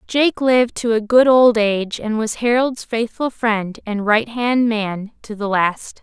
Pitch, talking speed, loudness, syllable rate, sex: 225 Hz, 180 wpm, -17 LUFS, 4.0 syllables/s, female